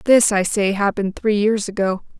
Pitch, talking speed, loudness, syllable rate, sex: 205 Hz, 190 wpm, -18 LUFS, 5.2 syllables/s, female